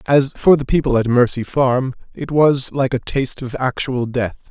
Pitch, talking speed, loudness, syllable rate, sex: 130 Hz, 200 wpm, -17 LUFS, 4.7 syllables/s, male